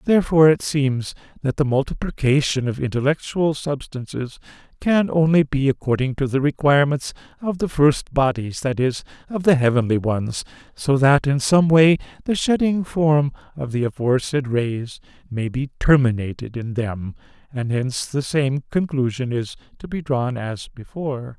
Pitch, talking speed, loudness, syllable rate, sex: 135 Hz, 150 wpm, -20 LUFS, 4.8 syllables/s, male